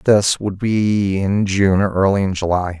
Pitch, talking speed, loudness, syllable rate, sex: 100 Hz, 195 wpm, -17 LUFS, 4.0 syllables/s, male